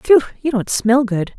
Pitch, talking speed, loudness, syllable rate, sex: 245 Hz, 215 wpm, -17 LUFS, 4.4 syllables/s, female